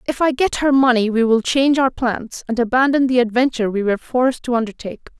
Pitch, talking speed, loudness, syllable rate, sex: 245 Hz, 220 wpm, -17 LUFS, 6.3 syllables/s, female